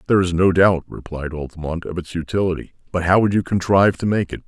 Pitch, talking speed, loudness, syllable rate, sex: 90 Hz, 230 wpm, -19 LUFS, 6.5 syllables/s, male